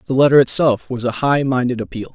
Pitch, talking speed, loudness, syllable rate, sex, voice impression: 130 Hz, 225 wpm, -16 LUFS, 6.1 syllables/s, male, masculine, adult-like, powerful, fluent, slightly halting, cool, sincere, slightly mature, wild, slightly strict, slightly sharp